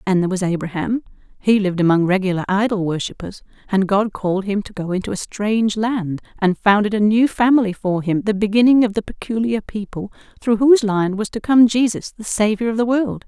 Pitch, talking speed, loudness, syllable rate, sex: 210 Hz, 205 wpm, -18 LUFS, 5.8 syllables/s, female